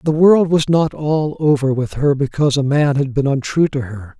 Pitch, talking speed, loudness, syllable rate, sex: 145 Hz, 230 wpm, -16 LUFS, 4.9 syllables/s, male